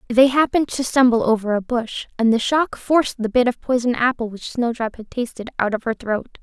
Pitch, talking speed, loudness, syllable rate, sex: 240 Hz, 225 wpm, -20 LUFS, 5.7 syllables/s, female